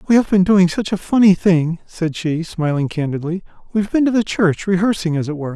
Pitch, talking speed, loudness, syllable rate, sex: 180 Hz, 225 wpm, -17 LUFS, 5.7 syllables/s, male